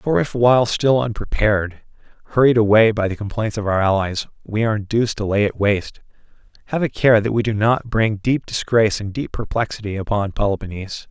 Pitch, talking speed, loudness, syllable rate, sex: 110 Hz, 190 wpm, -19 LUFS, 5.9 syllables/s, male